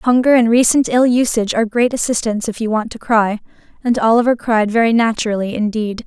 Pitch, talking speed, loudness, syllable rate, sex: 230 Hz, 190 wpm, -15 LUFS, 5.9 syllables/s, female